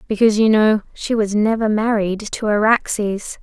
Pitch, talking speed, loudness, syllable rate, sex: 215 Hz, 160 wpm, -17 LUFS, 4.8 syllables/s, female